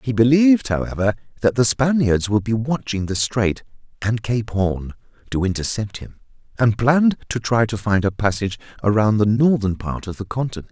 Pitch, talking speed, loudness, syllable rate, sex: 110 Hz, 180 wpm, -20 LUFS, 5.3 syllables/s, male